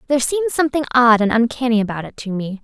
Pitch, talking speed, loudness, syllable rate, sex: 225 Hz, 225 wpm, -17 LUFS, 7.3 syllables/s, female